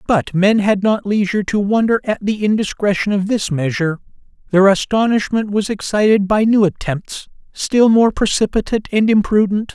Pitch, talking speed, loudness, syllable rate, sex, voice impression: 205 Hz, 155 wpm, -16 LUFS, 5.1 syllables/s, male, masculine, adult-like, slightly bright, slightly clear, unique